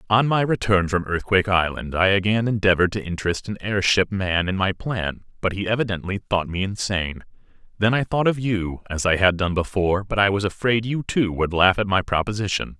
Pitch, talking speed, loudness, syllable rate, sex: 100 Hz, 205 wpm, -21 LUFS, 5.7 syllables/s, male